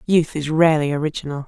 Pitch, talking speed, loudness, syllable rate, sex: 155 Hz, 160 wpm, -19 LUFS, 6.9 syllables/s, female